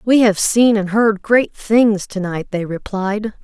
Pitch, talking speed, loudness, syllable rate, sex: 210 Hz, 190 wpm, -16 LUFS, 3.8 syllables/s, female